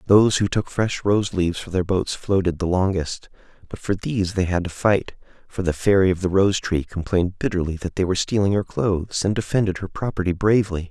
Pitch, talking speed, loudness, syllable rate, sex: 95 Hz, 215 wpm, -21 LUFS, 5.8 syllables/s, male